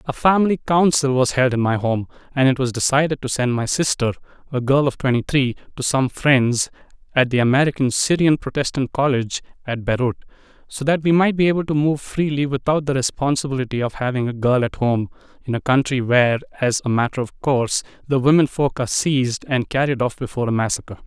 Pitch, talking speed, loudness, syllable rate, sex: 135 Hz, 200 wpm, -19 LUFS, 5.9 syllables/s, male